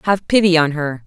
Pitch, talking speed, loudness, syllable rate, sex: 165 Hz, 225 wpm, -15 LUFS, 5.4 syllables/s, female